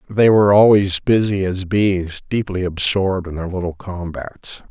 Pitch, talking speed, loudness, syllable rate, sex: 95 Hz, 155 wpm, -17 LUFS, 4.6 syllables/s, male